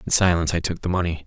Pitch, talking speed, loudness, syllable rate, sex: 85 Hz, 285 wpm, -22 LUFS, 7.3 syllables/s, male